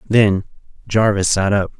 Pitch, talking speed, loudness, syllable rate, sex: 100 Hz, 135 wpm, -17 LUFS, 4.1 syllables/s, male